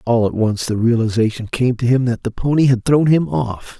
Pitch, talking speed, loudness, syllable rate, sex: 120 Hz, 235 wpm, -17 LUFS, 5.2 syllables/s, male